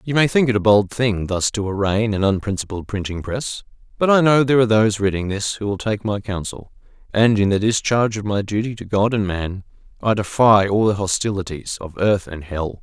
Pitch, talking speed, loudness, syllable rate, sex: 105 Hz, 220 wpm, -19 LUFS, 5.6 syllables/s, male